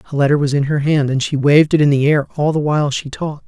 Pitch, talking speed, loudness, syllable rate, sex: 145 Hz, 310 wpm, -15 LUFS, 7.0 syllables/s, male